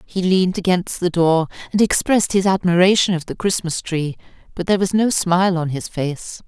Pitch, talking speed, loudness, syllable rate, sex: 180 Hz, 195 wpm, -18 LUFS, 5.5 syllables/s, female